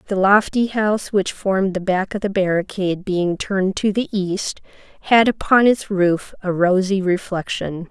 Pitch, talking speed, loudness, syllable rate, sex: 195 Hz, 165 wpm, -19 LUFS, 4.6 syllables/s, female